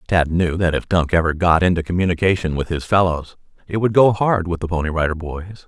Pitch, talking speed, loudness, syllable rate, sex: 90 Hz, 220 wpm, -18 LUFS, 5.8 syllables/s, male